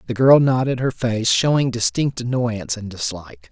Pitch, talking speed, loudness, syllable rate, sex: 120 Hz, 170 wpm, -19 LUFS, 5.1 syllables/s, male